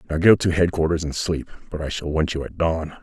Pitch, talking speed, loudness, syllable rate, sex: 80 Hz, 260 wpm, -22 LUFS, 5.8 syllables/s, male